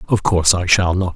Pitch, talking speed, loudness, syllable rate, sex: 90 Hz, 260 wpm, -15 LUFS, 6.1 syllables/s, male